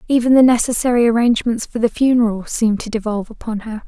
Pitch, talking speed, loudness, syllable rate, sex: 230 Hz, 185 wpm, -16 LUFS, 6.7 syllables/s, female